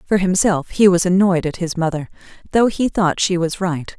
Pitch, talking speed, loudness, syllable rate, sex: 180 Hz, 210 wpm, -17 LUFS, 5.0 syllables/s, female